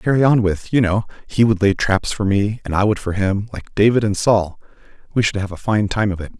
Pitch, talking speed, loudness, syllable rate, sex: 105 Hz, 270 wpm, -18 LUFS, 5.7 syllables/s, male